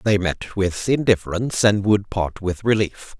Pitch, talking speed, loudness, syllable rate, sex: 100 Hz, 170 wpm, -20 LUFS, 4.6 syllables/s, male